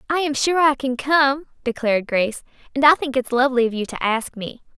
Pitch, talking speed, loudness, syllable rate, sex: 260 Hz, 225 wpm, -19 LUFS, 5.8 syllables/s, female